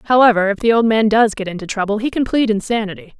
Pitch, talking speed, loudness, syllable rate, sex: 215 Hz, 245 wpm, -16 LUFS, 6.7 syllables/s, female